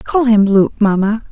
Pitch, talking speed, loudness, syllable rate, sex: 215 Hz, 180 wpm, -13 LUFS, 4.2 syllables/s, female